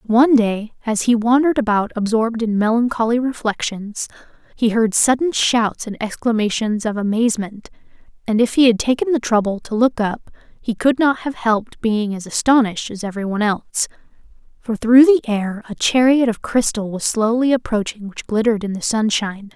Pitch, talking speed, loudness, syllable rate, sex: 225 Hz, 170 wpm, -18 LUFS, 5.4 syllables/s, female